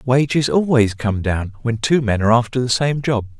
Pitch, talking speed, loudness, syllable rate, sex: 120 Hz, 210 wpm, -18 LUFS, 5.2 syllables/s, male